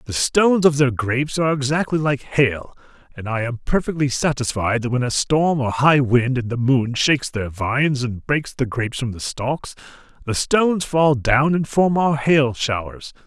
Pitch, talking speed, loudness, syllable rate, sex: 135 Hz, 195 wpm, -19 LUFS, 4.8 syllables/s, male